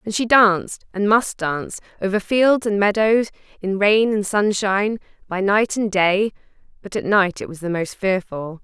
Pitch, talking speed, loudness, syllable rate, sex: 205 Hz, 180 wpm, -19 LUFS, 4.6 syllables/s, female